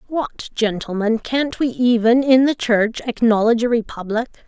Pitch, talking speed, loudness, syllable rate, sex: 235 Hz, 145 wpm, -18 LUFS, 4.7 syllables/s, female